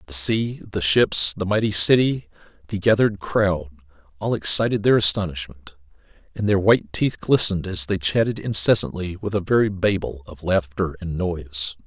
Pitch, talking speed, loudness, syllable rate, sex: 95 Hz, 155 wpm, -20 LUFS, 5.2 syllables/s, male